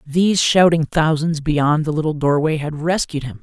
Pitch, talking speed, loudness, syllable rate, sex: 155 Hz, 175 wpm, -17 LUFS, 4.9 syllables/s, male